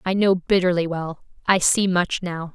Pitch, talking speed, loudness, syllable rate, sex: 180 Hz, 190 wpm, -21 LUFS, 4.5 syllables/s, female